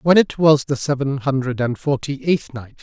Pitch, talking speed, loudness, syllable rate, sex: 140 Hz, 210 wpm, -19 LUFS, 4.7 syllables/s, male